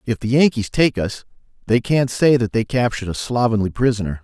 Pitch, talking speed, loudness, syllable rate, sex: 120 Hz, 200 wpm, -18 LUFS, 5.7 syllables/s, male